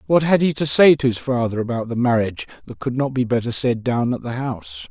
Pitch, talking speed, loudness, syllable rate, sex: 120 Hz, 255 wpm, -19 LUFS, 6.0 syllables/s, male